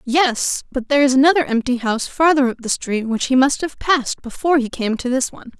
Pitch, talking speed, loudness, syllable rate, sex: 265 Hz, 235 wpm, -18 LUFS, 6.0 syllables/s, female